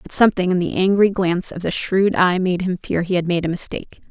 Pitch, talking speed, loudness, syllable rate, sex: 180 Hz, 265 wpm, -19 LUFS, 6.0 syllables/s, female